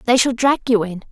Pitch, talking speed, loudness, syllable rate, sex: 235 Hz, 270 wpm, -17 LUFS, 5.6 syllables/s, female